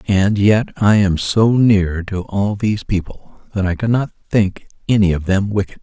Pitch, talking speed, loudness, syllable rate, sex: 100 Hz, 185 wpm, -16 LUFS, 4.4 syllables/s, male